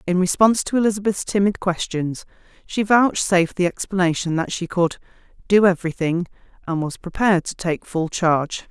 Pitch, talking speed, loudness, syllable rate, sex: 180 Hz, 150 wpm, -20 LUFS, 5.5 syllables/s, female